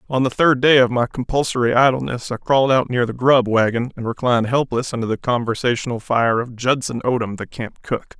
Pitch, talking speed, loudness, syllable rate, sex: 125 Hz, 205 wpm, -18 LUFS, 5.7 syllables/s, male